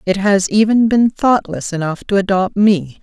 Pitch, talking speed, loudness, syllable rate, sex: 200 Hz, 180 wpm, -15 LUFS, 4.5 syllables/s, female